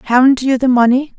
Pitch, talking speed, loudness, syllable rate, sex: 255 Hz, 205 wpm, -12 LUFS, 5.6 syllables/s, female